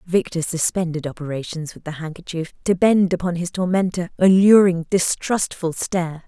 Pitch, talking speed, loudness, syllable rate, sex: 175 Hz, 145 wpm, -20 LUFS, 5.0 syllables/s, female